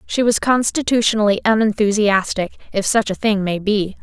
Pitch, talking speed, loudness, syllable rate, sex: 210 Hz, 150 wpm, -17 LUFS, 5.2 syllables/s, female